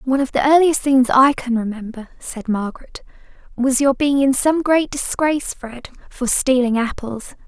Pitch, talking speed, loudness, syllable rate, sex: 260 Hz, 170 wpm, -17 LUFS, 4.7 syllables/s, female